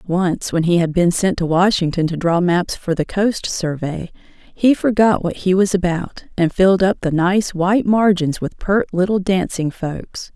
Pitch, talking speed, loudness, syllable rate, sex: 180 Hz, 190 wpm, -17 LUFS, 4.4 syllables/s, female